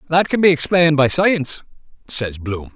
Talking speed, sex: 175 wpm, male